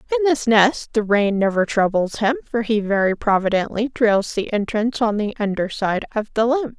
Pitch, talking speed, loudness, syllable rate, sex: 220 Hz, 195 wpm, -19 LUFS, 5.4 syllables/s, female